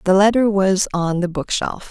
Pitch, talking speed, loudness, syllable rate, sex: 190 Hz, 190 wpm, -18 LUFS, 4.7 syllables/s, female